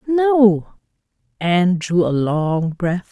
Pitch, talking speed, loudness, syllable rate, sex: 190 Hz, 115 wpm, -17 LUFS, 3.0 syllables/s, female